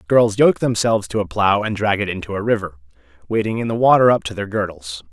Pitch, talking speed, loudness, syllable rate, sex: 105 Hz, 235 wpm, -18 LUFS, 6.2 syllables/s, male